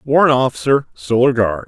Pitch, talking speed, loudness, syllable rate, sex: 125 Hz, 110 wpm, -15 LUFS, 5.1 syllables/s, male